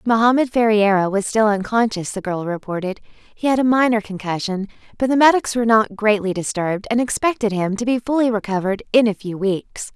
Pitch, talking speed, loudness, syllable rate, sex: 215 Hz, 185 wpm, -19 LUFS, 5.7 syllables/s, female